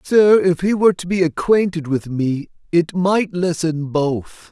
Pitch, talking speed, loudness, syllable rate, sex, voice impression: 170 Hz, 175 wpm, -18 LUFS, 4.1 syllables/s, male, masculine, middle-aged, slightly thick, slightly tensed, powerful, slightly halting, raspy, mature, friendly, wild, lively, strict, intense